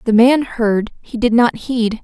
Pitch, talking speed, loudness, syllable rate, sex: 230 Hz, 235 wpm, -15 LUFS, 4.3 syllables/s, female